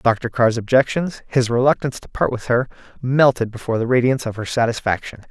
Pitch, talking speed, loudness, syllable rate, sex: 125 Hz, 180 wpm, -19 LUFS, 6.0 syllables/s, male